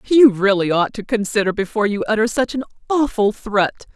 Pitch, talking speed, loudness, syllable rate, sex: 215 Hz, 180 wpm, -18 LUFS, 5.9 syllables/s, female